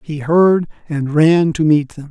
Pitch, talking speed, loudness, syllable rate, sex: 155 Hz, 200 wpm, -15 LUFS, 3.9 syllables/s, male